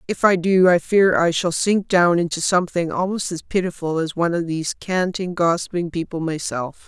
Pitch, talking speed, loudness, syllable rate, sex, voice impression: 175 Hz, 190 wpm, -20 LUFS, 5.3 syllables/s, female, very feminine, adult-like, slightly middle-aged, thin, tensed, slightly powerful, slightly dark, hard, very clear, slightly halting, slightly cool, intellectual, slightly refreshing, sincere, calm, slightly friendly, slightly reassuring, slightly unique, slightly elegant, wild, slightly lively, strict, sharp